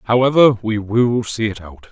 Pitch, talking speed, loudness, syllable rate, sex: 110 Hz, 190 wpm, -16 LUFS, 4.3 syllables/s, male